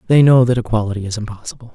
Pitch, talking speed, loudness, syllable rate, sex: 115 Hz, 205 wpm, -15 LUFS, 7.6 syllables/s, male